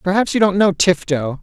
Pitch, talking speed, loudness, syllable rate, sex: 180 Hz, 210 wpm, -16 LUFS, 5.3 syllables/s, female